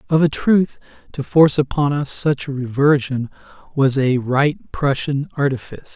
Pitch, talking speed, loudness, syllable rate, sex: 140 Hz, 150 wpm, -18 LUFS, 4.7 syllables/s, male